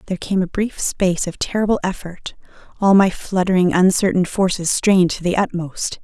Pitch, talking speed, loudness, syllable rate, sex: 185 Hz, 170 wpm, -18 LUFS, 5.4 syllables/s, female